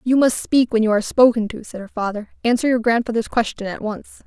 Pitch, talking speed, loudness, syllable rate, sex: 230 Hz, 240 wpm, -19 LUFS, 6.0 syllables/s, female